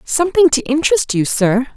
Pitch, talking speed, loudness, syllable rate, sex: 285 Hz, 170 wpm, -14 LUFS, 5.6 syllables/s, female